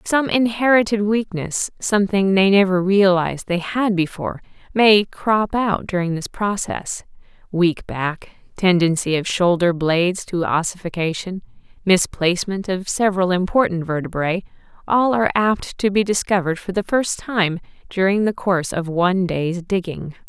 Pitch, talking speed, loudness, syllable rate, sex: 190 Hz, 135 wpm, -19 LUFS, 4.6 syllables/s, female